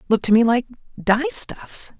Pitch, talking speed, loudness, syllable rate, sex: 220 Hz, 150 wpm, -20 LUFS, 4.1 syllables/s, female